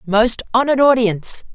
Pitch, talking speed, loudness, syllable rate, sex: 230 Hz, 115 wpm, -16 LUFS, 5.6 syllables/s, female